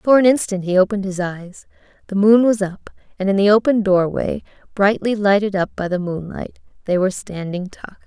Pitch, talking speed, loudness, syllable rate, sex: 200 Hz, 195 wpm, -18 LUFS, 5.6 syllables/s, female